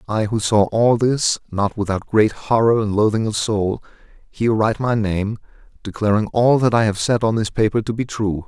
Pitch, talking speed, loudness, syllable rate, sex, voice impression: 110 Hz, 205 wpm, -18 LUFS, 5.1 syllables/s, male, very masculine, very adult-like, middle-aged, very thick, slightly relaxed, powerful, slightly dark, slightly hard, clear, fluent, cool, very intellectual, very sincere, very calm, very mature, very friendly, very reassuring, unique, very elegant, wild, very sweet, kind, very modest